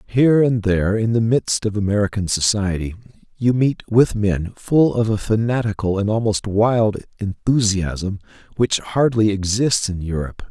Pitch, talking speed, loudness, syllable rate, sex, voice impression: 105 Hz, 150 wpm, -19 LUFS, 4.6 syllables/s, male, masculine, adult-like, thick, tensed, powerful, slightly hard, slightly raspy, cool, intellectual, calm, mature, reassuring, wild, lively, slightly strict